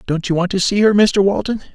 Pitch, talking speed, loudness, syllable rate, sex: 195 Hz, 275 wpm, -15 LUFS, 6.0 syllables/s, male